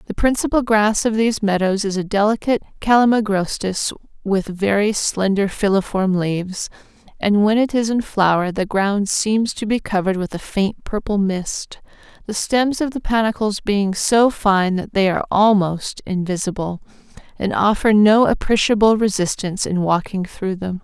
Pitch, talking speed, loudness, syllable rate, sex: 205 Hz, 155 wpm, -18 LUFS, 4.8 syllables/s, female